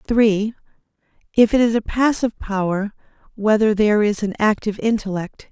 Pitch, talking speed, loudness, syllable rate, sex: 215 Hz, 140 wpm, -19 LUFS, 5.9 syllables/s, female